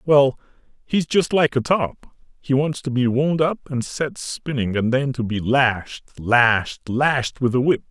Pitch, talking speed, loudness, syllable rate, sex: 135 Hz, 190 wpm, -20 LUFS, 3.8 syllables/s, male